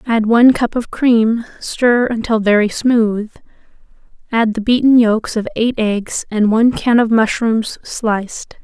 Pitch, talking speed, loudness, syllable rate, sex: 225 Hz, 155 wpm, -15 LUFS, 4.1 syllables/s, female